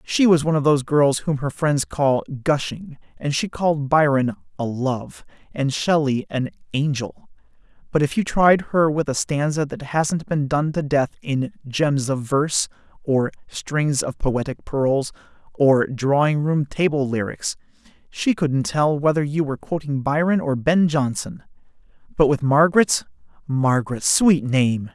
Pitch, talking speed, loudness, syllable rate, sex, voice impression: 145 Hz, 155 wpm, -21 LUFS, 4.3 syllables/s, male, very masculine, very adult-like, slightly thick, tensed, powerful, slightly dark, slightly hard, clear, fluent, cool, very intellectual, refreshing, very sincere, calm, friendly, reassuring, slightly unique, slightly elegant, wild, slightly sweet, lively, strict, slightly intense